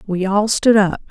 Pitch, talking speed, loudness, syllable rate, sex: 200 Hz, 220 wpm, -15 LUFS, 4.6 syllables/s, female